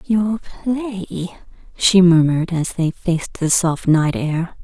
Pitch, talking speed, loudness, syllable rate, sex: 180 Hz, 140 wpm, -18 LUFS, 3.9 syllables/s, female